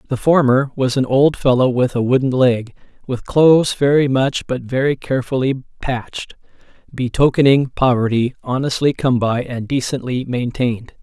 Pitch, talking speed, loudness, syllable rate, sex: 130 Hz, 140 wpm, -17 LUFS, 4.9 syllables/s, male